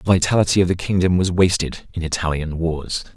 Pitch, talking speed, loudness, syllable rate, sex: 85 Hz, 190 wpm, -19 LUFS, 5.7 syllables/s, male